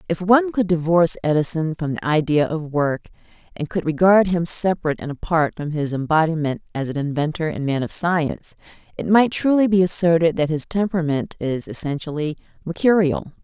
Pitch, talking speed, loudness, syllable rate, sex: 165 Hz, 170 wpm, -20 LUFS, 5.6 syllables/s, female